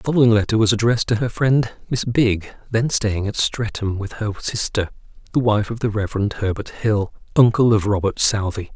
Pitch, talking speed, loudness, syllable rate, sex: 110 Hz, 190 wpm, -20 LUFS, 5.4 syllables/s, male